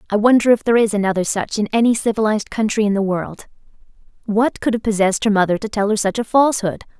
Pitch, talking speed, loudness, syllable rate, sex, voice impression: 215 Hz, 225 wpm, -17 LUFS, 6.8 syllables/s, female, very feminine, young, fluent, cute, slightly refreshing, friendly, slightly kind